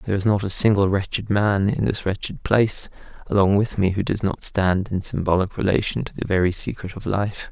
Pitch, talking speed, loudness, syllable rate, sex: 100 Hz, 215 wpm, -21 LUFS, 5.6 syllables/s, male